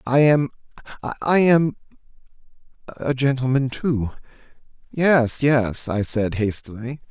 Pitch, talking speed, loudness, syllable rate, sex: 130 Hz, 85 wpm, -20 LUFS, 3.7 syllables/s, male